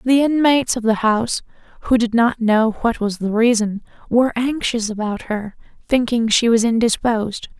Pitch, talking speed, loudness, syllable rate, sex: 230 Hz, 165 wpm, -18 LUFS, 5.0 syllables/s, female